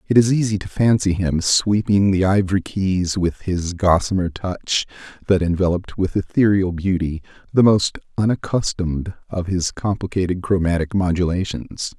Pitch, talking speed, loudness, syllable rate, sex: 95 Hz, 135 wpm, -19 LUFS, 4.8 syllables/s, male